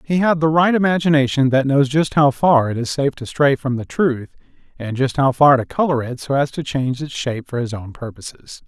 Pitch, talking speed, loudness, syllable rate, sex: 140 Hz, 240 wpm, -18 LUFS, 5.5 syllables/s, male